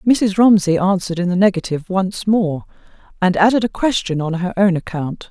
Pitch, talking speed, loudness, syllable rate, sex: 190 Hz, 180 wpm, -17 LUFS, 5.5 syllables/s, female